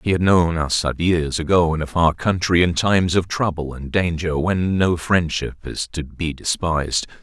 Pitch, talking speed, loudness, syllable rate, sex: 85 Hz, 190 wpm, -20 LUFS, 4.7 syllables/s, male